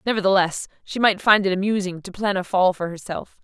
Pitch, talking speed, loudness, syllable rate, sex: 190 Hz, 210 wpm, -21 LUFS, 5.7 syllables/s, female